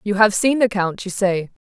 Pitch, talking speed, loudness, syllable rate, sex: 205 Hz, 250 wpm, -19 LUFS, 4.9 syllables/s, female